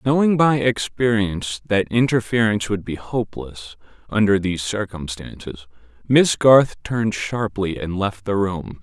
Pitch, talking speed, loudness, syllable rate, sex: 105 Hz, 130 wpm, -20 LUFS, 4.5 syllables/s, male